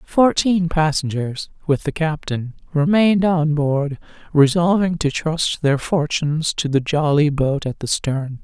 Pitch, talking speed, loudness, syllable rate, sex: 155 Hz, 140 wpm, -19 LUFS, 4.0 syllables/s, female